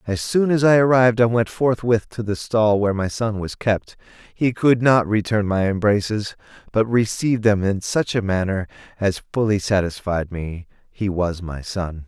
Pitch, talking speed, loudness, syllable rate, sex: 105 Hz, 185 wpm, -20 LUFS, 4.7 syllables/s, male